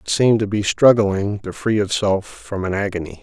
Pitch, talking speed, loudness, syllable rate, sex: 100 Hz, 205 wpm, -18 LUFS, 5.2 syllables/s, male